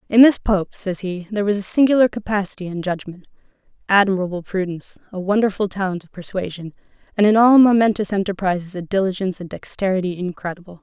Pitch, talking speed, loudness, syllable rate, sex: 195 Hz, 160 wpm, -19 LUFS, 6.5 syllables/s, female